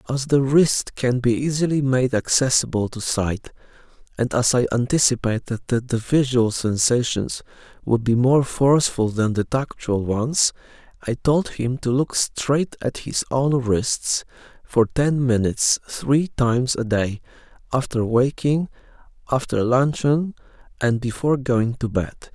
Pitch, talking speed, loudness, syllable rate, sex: 125 Hz, 140 wpm, -21 LUFS, 4.1 syllables/s, male